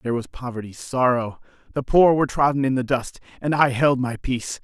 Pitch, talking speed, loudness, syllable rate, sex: 130 Hz, 205 wpm, -21 LUFS, 5.8 syllables/s, male